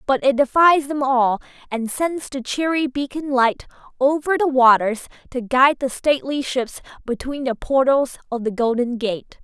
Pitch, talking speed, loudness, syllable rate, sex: 265 Hz, 165 wpm, -19 LUFS, 4.6 syllables/s, female